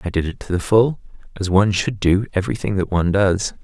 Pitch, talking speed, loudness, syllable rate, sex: 100 Hz, 230 wpm, -19 LUFS, 6.3 syllables/s, male